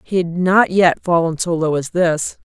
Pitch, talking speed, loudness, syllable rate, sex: 170 Hz, 220 wpm, -16 LUFS, 4.3 syllables/s, female